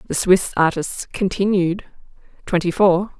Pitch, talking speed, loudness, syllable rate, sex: 185 Hz, 115 wpm, -19 LUFS, 4.2 syllables/s, female